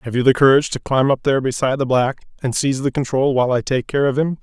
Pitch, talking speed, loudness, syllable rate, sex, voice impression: 135 Hz, 285 wpm, -18 LUFS, 7.2 syllables/s, male, masculine, adult-like, slightly muffled, sincere, calm, friendly, kind